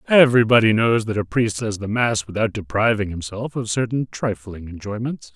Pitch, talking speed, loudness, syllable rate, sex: 110 Hz, 170 wpm, -20 LUFS, 5.3 syllables/s, male